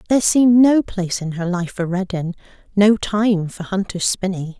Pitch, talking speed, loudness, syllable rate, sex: 195 Hz, 185 wpm, -18 LUFS, 5.0 syllables/s, female